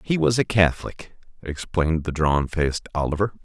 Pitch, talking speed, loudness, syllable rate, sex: 90 Hz, 155 wpm, -22 LUFS, 5.4 syllables/s, male